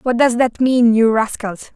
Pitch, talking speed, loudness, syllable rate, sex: 235 Hz, 205 wpm, -15 LUFS, 4.3 syllables/s, female